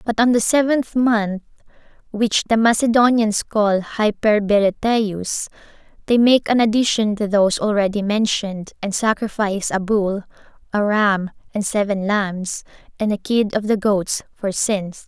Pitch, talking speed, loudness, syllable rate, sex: 210 Hz, 140 wpm, -19 LUFS, 4.5 syllables/s, female